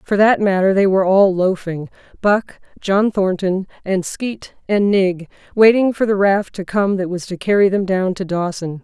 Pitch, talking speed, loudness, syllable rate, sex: 190 Hz, 175 wpm, -17 LUFS, 4.7 syllables/s, female